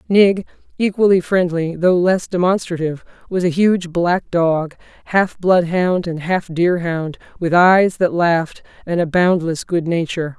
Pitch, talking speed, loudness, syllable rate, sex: 175 Hz, 145 wpm, -17 LUFS, 4.3 syllables/s, female